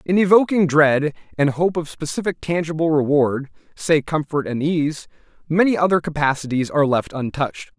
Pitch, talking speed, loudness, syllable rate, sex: 155 Hz, 130 wpm, -19 LUFS, 5.2 syllables/s, male